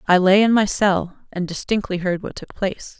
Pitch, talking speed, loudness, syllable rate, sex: 190 Hz, 220 wpm, -19 LUFS, 5.2 syllables/s, female